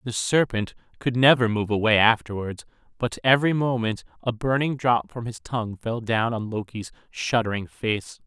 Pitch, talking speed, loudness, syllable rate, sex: 115 Hz, 160 wpm, -23 LUFS, 4.9 syllables/s, male